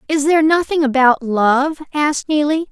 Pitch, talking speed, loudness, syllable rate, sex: 290 Hz, 155 wpm, -15 LUFS, 4.9 syllables/s, female